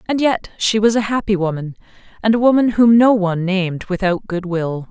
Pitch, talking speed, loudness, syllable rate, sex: 200 Hz, 210 wpm, -16 LUFS, 5.4 syllables/s, female